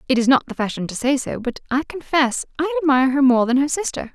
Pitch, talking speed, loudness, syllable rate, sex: 275 Hz, 260 wpm, -19 LUFS, 6.4 syllables/s, female